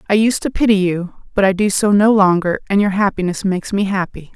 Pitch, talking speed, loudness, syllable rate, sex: 195 Hz, 235 wpm, -16 LUFS, 6.0 syllables/s, female